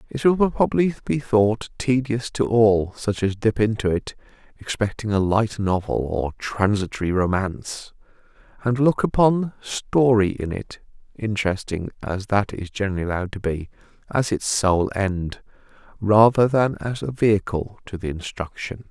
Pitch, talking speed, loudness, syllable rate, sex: 105 Hz, 145 wpm, -22 LUFS, 3.8 syllables/s, male